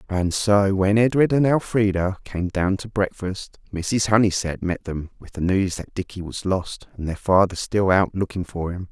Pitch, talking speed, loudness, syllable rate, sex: 95 Hz, 195 wpm, -22 LUFS, 4.6 syllables/s, male